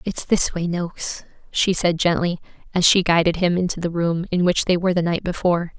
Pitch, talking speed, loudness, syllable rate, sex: 175 Hz, 220 wpm, -20 LUFS, 5.6 syllables/s, female